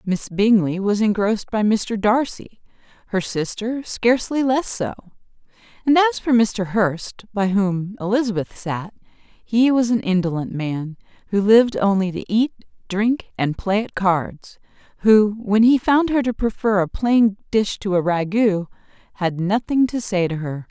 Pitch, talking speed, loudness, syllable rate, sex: 210 Hz, 160 wpm, -20 LUFS, 4.3 syllables/s, female